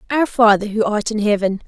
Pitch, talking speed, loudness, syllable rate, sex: 215 Hz, 215 wpm, -17 LUFS, 5.5 syllables/s, female